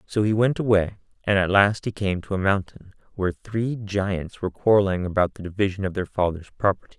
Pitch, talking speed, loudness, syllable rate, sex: 100 Hz, 205 wpm, -23 LUFS, 5.8 syllables/s, male